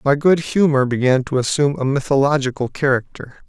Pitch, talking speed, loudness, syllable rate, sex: 140 Hz, 155 wpm, -17 LUFS, 5.7 syllables/s, male